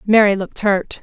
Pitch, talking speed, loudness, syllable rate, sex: 200 Hz, 175 wpm, -16 LUFS, 5.4 syllables/s, female